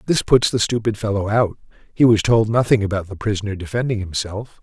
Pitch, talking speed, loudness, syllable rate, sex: 105 Hz, 195 wpm, -19 LUFS, 5.9 syllables/s, male